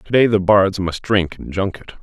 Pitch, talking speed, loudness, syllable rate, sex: 95 Hz, 205 wpm, -17 LUFS, 4.6 syllables/s, male